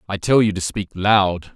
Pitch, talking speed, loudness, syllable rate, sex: 100 Hz, 230 wpm, -18 LUFS, 4.6 syllables/s, male